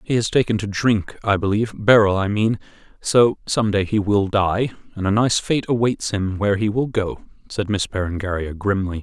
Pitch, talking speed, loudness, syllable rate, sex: 105 Hz, 185 wpm, -20 LUFS, 5.2 syllables/s, male